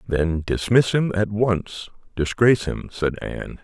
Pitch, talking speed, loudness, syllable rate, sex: 100 Hz, 150 wpm, -21 LUFS, 4.1 syllables/s, male